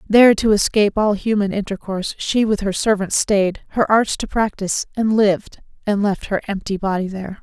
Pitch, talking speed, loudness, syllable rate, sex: 205 Hz, 185 wpm, -18 LUFS, 5.5 syllables/s, female